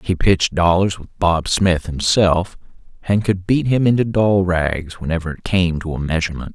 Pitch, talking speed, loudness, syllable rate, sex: 90 Hz, 185 wpm, -18 LUFS, 4.8 syllables/s, male